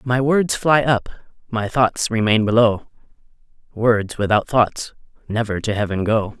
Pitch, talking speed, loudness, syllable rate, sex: 110 Hz, 140 wpm, -19 LUFS, 4.1 syllables/s, male